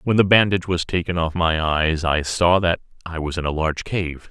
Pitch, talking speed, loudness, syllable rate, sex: 85 Hz, 235 wpm, -20 LUFS, 5.3 syllables/s, male